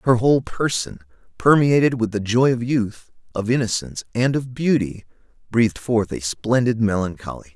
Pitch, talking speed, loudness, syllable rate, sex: 115 Hz, 150 wpm, -20 LUFS, 5.1 syllables/s, male